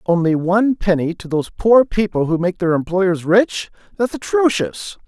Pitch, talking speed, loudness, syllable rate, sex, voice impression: 190 Hz, 165 wpm, -17 LUFS, 4.8 syllables/s, male, very masculine, old, thick, slightly tensed, powerful, slightly bright, slightly hard, clear, slightly halting, slightly raspy, cool, intellectual, refreshing, sincere, slightly calm, friendly, reassuring, slightly unique, slightly elegant, wild, slightly sweet, lively, strict, slightly intense